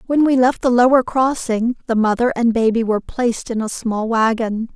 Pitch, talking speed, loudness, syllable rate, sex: 235 Hz, 200 wpm, -17 LUFS, 5.2 syllables/s, female